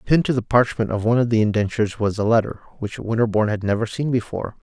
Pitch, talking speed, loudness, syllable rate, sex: 110 Hz, 230 wpm, -21 LUFS, 7.2 syllables/s, male